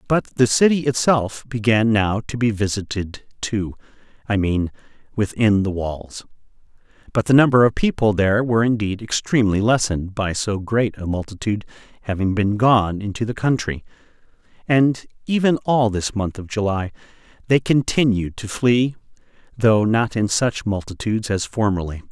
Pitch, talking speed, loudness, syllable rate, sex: 110 Hz, 145 wpm, -20 LUFS, 4.9 syllables/s, male